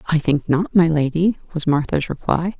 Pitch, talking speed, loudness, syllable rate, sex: 160 Hz, 185 wpm, -19 LUFS, 4.9 syllables/s, female